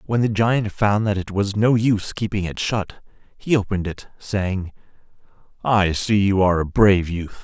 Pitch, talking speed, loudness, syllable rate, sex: 100 Hz, 185 wpm, -20 LUFS, 4.9 syllables/s, male